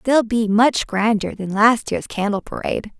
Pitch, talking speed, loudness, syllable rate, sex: 220 Hz, 180 wpm, -19 LUFS, 4.6 syllables/s, female